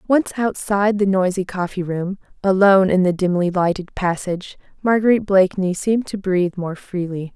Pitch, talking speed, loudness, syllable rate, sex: 190 Hz, 155 wpm, -19 LUFS, 5.5 syllables/s, female